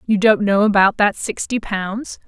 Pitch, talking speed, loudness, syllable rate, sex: 205 Hz, 185 wpm, -17 LUFS, 4.3 syllables/s, female